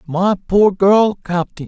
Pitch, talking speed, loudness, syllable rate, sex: 190 Hz, 145 wpm, -15 LUFS, 3.3 syllables/s, male